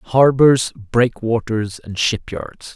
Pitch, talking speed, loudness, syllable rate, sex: 115 Hz, 85 wpm, -17 LUFS, 3.0 syllables/s, male